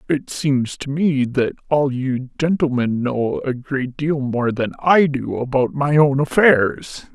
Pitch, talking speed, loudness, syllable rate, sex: 135 Hz, 170 wpm, -19 LUFS, 3.6 syllables/s, male